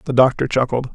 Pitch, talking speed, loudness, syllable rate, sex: 130 Hz, 190 wpm, -18 LUFS, 5.7 syllables/s, male